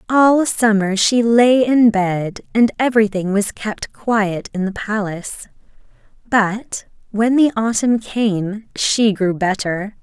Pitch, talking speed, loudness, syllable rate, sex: 215 Hz, 130 wpm, -17 LUFS, 3.5 syllables/s, female